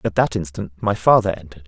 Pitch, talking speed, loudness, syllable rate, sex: 95 Hz, 215 wpm, -19 LUFS, 6.5 syllables/s, male